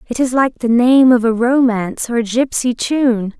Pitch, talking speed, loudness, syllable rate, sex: 240 Hz, 210 wpm, -14 LUFS, 4.6 syllables/s, female